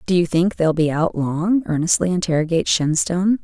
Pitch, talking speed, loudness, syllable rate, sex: 170 Hz, 175 wpm, -19 LUFS, 5.5 syllables/s, female